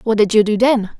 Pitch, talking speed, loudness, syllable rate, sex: 220 Hz, 300 wpm, -14 LUFS, 5.6 syllables/s, female